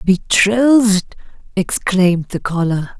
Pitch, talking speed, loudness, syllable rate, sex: 195 Hz, 80 wpm, -15 LUFS, 3.6 syllables/s, female